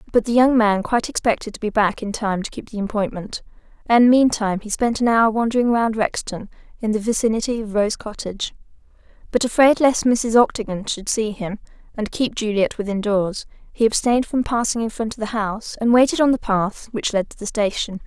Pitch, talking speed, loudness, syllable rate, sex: 220 Hz, 205 wpm, -20 LUFS, 5.6 syllables/s, female